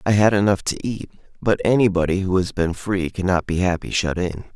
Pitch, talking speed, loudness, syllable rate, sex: 95 Hz, 210 wpm, -20 LUFS, 5.4 syllables/s, male